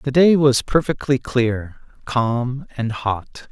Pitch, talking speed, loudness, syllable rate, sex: 125 Hz, 135 wpm, -19 LUFS, 3.2 syllables/s, male